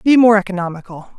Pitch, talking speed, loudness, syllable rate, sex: 200 Hz, 150 wpm, -14 LUFS, 6.4 syllables/s, female